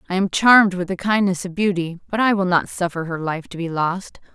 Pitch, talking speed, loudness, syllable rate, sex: 185 Hz, 250 wpm, -19 LUFS, 5.6 syllables/s, female